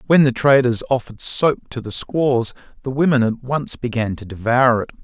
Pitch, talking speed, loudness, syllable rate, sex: 125 Hz, 190 wpm, -18 LUFS, 5.1 syllables/s, male